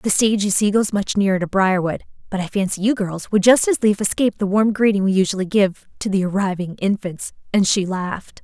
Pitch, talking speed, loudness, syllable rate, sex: 200 Hz, 230 wpm, -19 LUFS, 5.8 syllables/s, female